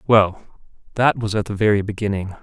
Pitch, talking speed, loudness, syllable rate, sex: 105 Hz, 175 wpm, -20 LUFS, 5.3 syllables/s, male